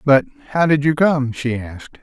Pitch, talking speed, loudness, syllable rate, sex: 145 Hz, 210 wpm, -18 LUFS, 4.9 syllables/s, male